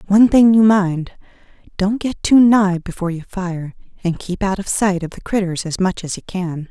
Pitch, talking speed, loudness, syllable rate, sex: 190 Hz, 215 wpm, -17 LUFS, 5.0 syllables/s, female